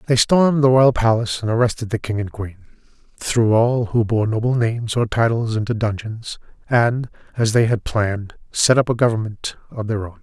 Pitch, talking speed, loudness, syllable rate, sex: 115 Hz, 195 wpm, -19 LUFS, 5.3 syllables/s, male